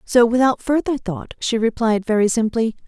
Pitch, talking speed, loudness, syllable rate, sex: 230 Hz, 165 wpm, -19 LUFS, 4.9 syllables/s, female